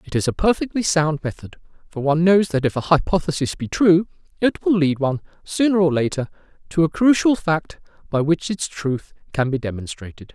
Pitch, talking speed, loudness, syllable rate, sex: 160 Hz, 190 wpm, -20 LUFS, 5.5 syllables/s, male